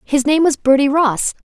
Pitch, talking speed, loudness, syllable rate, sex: 280 Hz, 205 wpm, -15 LUFS, 4.7 syllables/s, female